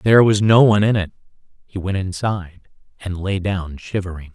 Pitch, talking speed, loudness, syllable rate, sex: 95 Hz, 180 wpm, -18 LUFS, 5.6 syllables/s, male